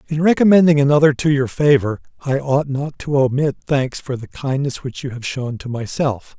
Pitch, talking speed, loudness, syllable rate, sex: 140 Hz, 195 wpm, -18 LUFS, 5.1 syllables/s, male